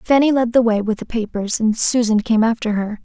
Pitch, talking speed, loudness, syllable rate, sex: 225 Hz, 235 wpm, -17 LUFS, 5.5 syllables/s, female